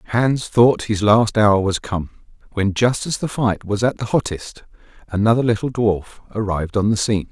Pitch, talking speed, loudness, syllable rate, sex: 110 Hz, 190 wpm, -19 LUFS, 5.1 syllables/s, male